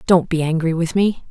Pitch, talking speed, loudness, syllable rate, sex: 170 Hz, 230 wpm, -18 LUFS, 5.3 syllables/s, female